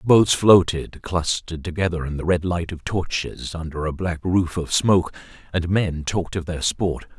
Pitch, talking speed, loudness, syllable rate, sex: 85 Hz, 190 wpm, -22 LUFS, 4.8 syllables/s, male